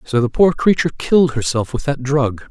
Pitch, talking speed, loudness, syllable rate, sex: 135 Hz, 215 wpm, -16 LUFS, 5.7 syllables/s, male